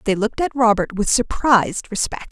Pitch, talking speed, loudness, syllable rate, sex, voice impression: 220 Hz, 180 wpm, -18 LUFS, 5.6 syllables/s, female, feminine, very adult-like, slightly muffled, slightly fluent, slightly intellectual, slightly intense